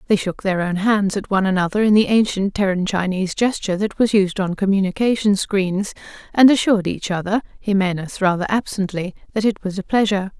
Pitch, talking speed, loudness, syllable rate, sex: 200 Hz, 175 wpm, -19 LUFS, 5.9 syllables/s, female